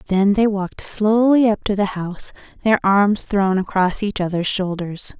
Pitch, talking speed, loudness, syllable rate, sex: 200 Hz, 175 wpm, -18 LUFS, 4.6 syllables/s, female